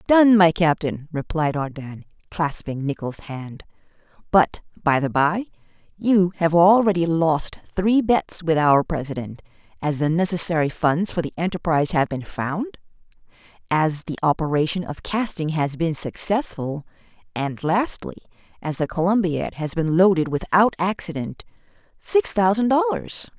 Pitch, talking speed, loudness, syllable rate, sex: 165 Hz, 135 wpm, -21 LUFS, 4.5 syllables/s, female